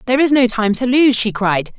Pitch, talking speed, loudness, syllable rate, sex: 235 Hz, 270 wpm, -15 LUFS, 5.7 syllables/s, female